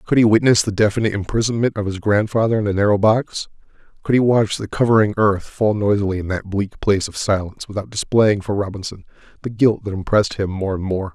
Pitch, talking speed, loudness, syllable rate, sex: 105 Hz, 210 wpm, -18 LUFS, 6.2 syllables/s, male